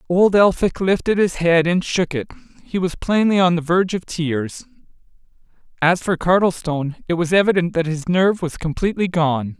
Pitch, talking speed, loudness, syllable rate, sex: 175 Hz, 175 wpm, -18 LUFS, 5.3 syllables/s, male